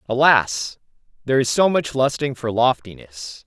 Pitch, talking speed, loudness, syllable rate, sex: 125 Hz, 140 wpm, -19 LUFS, 4.5 syllables/s, male